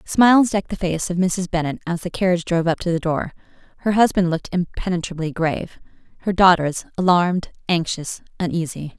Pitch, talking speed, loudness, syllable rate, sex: 175 Hz, 165 wpm, -20 LUFS, 5.9 syllables/s, female